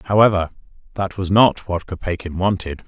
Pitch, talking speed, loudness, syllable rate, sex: 95 Hz, 145 wpm, -19 LUFS, 5.0 syllables/s, male